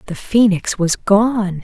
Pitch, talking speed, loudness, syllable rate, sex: 195 Hz, 145 wpm, -15 LUFS, 3.5 syllables/s, female